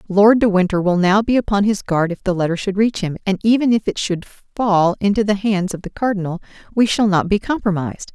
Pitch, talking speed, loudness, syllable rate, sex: 200 Hz, 235 wpm, -17 LUFS, 5.9 syllables/s, female